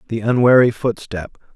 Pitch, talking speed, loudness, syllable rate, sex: 115 Hz, 115 wpm, -16 LUFS, 4.9 syllables/s, male